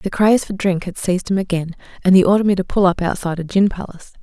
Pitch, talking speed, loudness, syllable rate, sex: 185 Hz, 270 wpm, -17 LUFS, 7.3 syllables/s, female